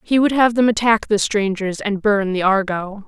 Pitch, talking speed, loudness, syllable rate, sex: 210 Hz, 215 wpm, -17 LUFS, 4.7 syllables/s, female